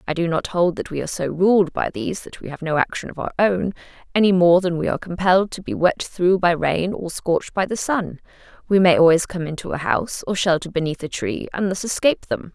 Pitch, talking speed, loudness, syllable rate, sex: 180 Hz, 250 wpm, -20 LUFS, 5.9 syllables/s, female